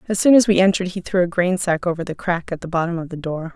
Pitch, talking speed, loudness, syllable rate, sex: 180 Hz, 305 wpm, -19 LUFS, 6.9 syllables/s, female